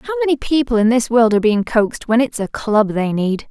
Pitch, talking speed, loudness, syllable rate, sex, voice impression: 235 Hz, 255 wpm, -16 LUFS, 7.2 syllables/s, female, very feminine, slightly young, slightly adult-like, very thin, slightly tensed, slightly powerful, bright, very hard, very clear, fluent, cute, very intellectual, very refreshing, sincere, calm, friendly, very reassuring, unique, slightly elegant, slightly wild, very sweet, lively, slightly kind, slightly intense, slightly sharp, light